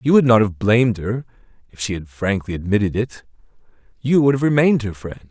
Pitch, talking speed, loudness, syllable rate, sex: 110 Hz, 205 wpm, -19 LUFS, 5.9 syllables/s, male